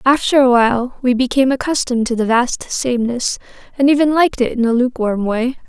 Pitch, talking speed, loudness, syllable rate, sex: 250 Hz, 190 wpm, -16 LUFS, 6.1 syllables/s, female